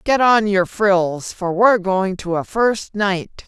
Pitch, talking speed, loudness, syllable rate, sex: 200 Hz, 190 wpm, -17 LUFS, 3.6 syllables/s, female